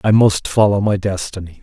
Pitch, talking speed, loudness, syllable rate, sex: 100 Hz, 185 wpm, -16 LUFS, 5.2 syllables/s, male